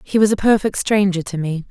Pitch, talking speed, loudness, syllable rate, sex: 195 Hz, 245 wpm, -17 LUFS, 5.7 syllables/s, female